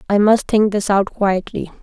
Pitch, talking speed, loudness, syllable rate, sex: 205 Hz, 195 wpm, -16 LUFS, 4.6 syllables/s, female